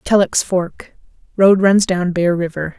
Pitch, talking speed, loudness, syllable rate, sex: 180 Hz, 130 wpm, -15 LUFS, 3.9 syllables/s, female